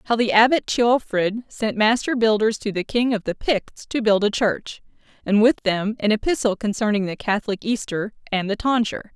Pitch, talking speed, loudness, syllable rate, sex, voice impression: 220 Hz, 190 wpm, -21 LUFS, 5.1 syllables/s, female, feminine, adult-like, tensed, powerful, bright, clear, fluent, intellectual, friendly, elegant, lively, slightly intense, slightly sharp